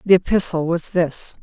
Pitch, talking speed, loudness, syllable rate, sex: 170 Hz, 170 wpm, -19 LUFS, 4.7 syllables/s, female